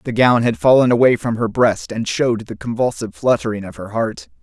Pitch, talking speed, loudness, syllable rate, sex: 115 Hz, 215 wpm, -17 LUFS, 5.7 syllables/s, male